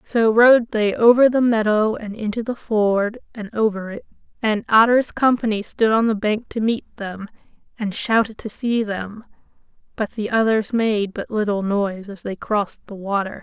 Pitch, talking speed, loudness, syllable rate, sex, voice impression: 215 Hz, 180 wpm, -20 LUFS, 4.6 syllables/s, female, feminine, very gender-neutral, adult-like, very thin, tensed, weak, dark, very soft, clear, slightly fluent, raspy, cute, intellectual, slightly refreshing, sincere, very calm, very friendly, reassuring, very unique, very elegant, slightly wild, sweet, lively, kind, slightly sharp, modest, light